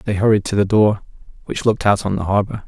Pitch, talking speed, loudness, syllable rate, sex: 105 Hz, 245 wpm, -17 LUFS, 6.4 syllables/s, male